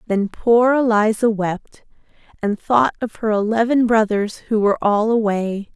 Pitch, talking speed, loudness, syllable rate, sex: 220 Hz, 145 wpm, -18 LUFS, 4.4 syllables/s, female